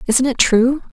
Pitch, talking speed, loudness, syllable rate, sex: 255 Hz, 180 wpm, -15 LUFS, 4.4 syllables/s, female